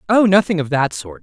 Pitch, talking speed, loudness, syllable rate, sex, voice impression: 160 Hz, 245 wpm, -16 LUFS, 5.5 syllables/s, male, masculine, adult-like, tensed, slightly powerful, bright, fluent, intellectual, calm, friendly, unique, lively, slightly modest